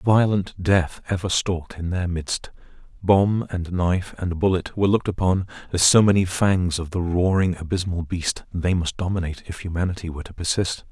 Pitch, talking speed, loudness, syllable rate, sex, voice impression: 90 Hz, 175 wpm, -22 LUFS, 5.3 syllables/s, male, masculine, very adult-like, thick, slightly muffled, sincere, slightly wild